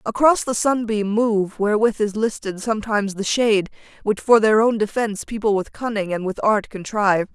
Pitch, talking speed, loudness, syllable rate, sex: 215 Hz, 180 wpm, -20 LUFS, 5.4 syllables/s, female